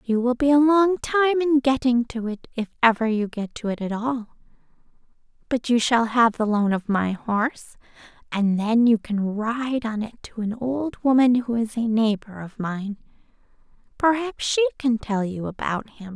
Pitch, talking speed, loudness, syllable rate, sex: 235 Hz, 190 wpm, -22 LUFS, 4.6 syllables/s, female